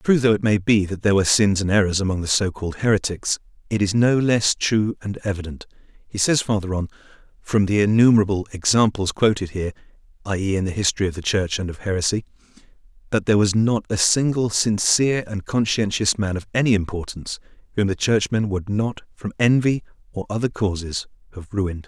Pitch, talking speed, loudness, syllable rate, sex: 105 Hz, 185 wpm, -21 LUFS, 5.2 syllables/s, male